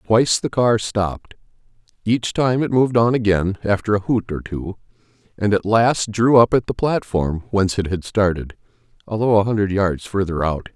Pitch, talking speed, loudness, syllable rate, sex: 105 Hz, 185 wpm, -19 LUFS, 5.1 syllables/s, male